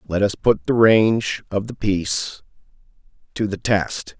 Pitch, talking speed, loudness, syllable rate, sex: 100 Hz, 155 wpm, -20 LUFS, 4.2 syllables/s, male